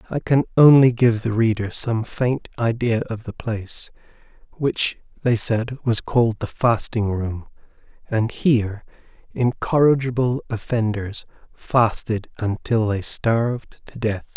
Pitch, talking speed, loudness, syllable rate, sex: 115 Hz, 125 wpm, -21 LUFS, 4.0 syllables/s, male